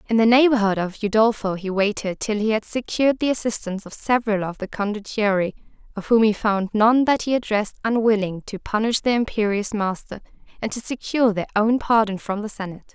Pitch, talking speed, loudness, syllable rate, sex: 215 Hz, 190 wpm, -21 LUFS, 5.9 syllables/s, female